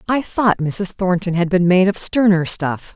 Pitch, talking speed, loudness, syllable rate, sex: 185 Hz, 205 wpm, -17 LUFS, 4.3 syllables/s, female